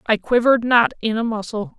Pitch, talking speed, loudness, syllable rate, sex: 225 Hz, 200 wpm, -18 LUFS, 5.7 syllables/s, female